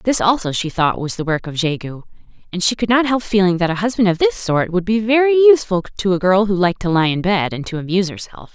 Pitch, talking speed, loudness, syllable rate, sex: 190 Hz, 265 wpm, -17 LUFS, 6.2 syllables/s, female